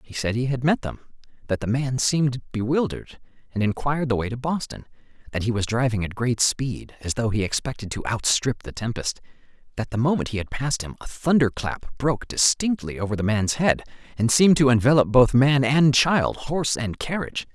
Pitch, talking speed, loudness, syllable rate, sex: 125 Hz, 200 wpm, -23 LUFS, 5.6 syllables/s, male